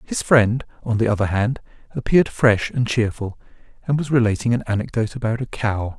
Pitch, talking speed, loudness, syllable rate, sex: 115 Hz, 180 wpm, -20 LUFS, 5.7 syllables/s, male